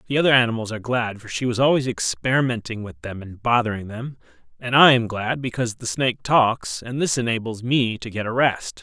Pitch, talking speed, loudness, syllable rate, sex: 120 Hz, 210 wpm, -21 LUFS, 5.7 syllables/s, male